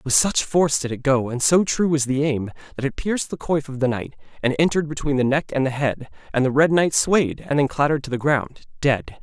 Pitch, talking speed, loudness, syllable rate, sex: 140 Hz, 260 wpm, -21 LUFS, 5.8 syllables/s, male